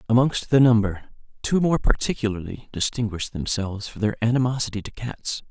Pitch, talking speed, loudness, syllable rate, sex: 115 Hz, 140 wpm, -23 LUFS, 5.7 syllables/s, male